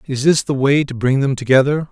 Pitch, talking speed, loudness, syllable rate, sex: 135 Hz, 250 wpm, -16 LUFS, 5.7 syllables/s, male